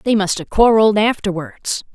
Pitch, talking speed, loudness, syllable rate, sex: 205 Hz, 155 wpm, -16 LUFS, 5.1 syllables/s, female